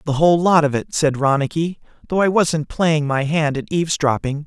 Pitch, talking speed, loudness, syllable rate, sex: 155 Hz, 200 wpm, -18 LUFS, 5.3 syllables/s, male